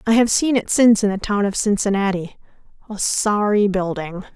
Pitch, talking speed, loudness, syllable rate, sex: 205 Hz, 165 wpm, -18 LUFS, 5.2 syllables/s, female